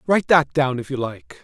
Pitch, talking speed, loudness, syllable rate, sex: 140 Hz, 250 wpm, -20 LUFS, 5.4 syllables/s, male